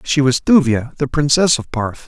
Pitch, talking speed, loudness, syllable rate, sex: 140 Hz, 205 wpm, -15 LUFS, 4.7 syllables/s, male